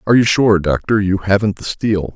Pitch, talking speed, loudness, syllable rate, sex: 100 Hz, 225 wpm, -15 LUFS, 5.5 syllables/s, male